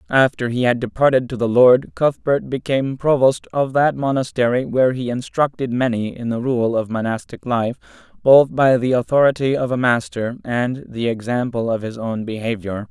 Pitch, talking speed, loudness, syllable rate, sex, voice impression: 125 Hz, 170 wpm, -18 LUFS, 5.0 syllables/s, male, masculine, adult-like, clear, fluent, slightly raspy, intellectual, calm, friendly, reassuring, kind, slightly modest